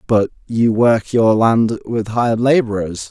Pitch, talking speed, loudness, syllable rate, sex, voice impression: 110 Hz, 155 wpm, -16 LUFS, 4.0 syllables/s, male, very masculine, very adult-like, slightly old, very thick, slightly tensed, weak, slightly dark, hard, slightly muffled, slightly halting, slightly raspy, cool, intellectual, very sincere, very calm, very mature, slightly friendly, reassuring, unique, wild, slightly sweet, slightly lively, kind, slightly modest